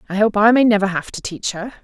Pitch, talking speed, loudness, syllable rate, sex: 205 Hz, 295 wpm, -17 LUFS, 6.4 syllables/s, female